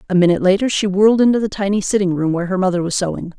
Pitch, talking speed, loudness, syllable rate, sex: 190 Hz, 265 wpm, -16 LUFS, 7.8 syllables/s, female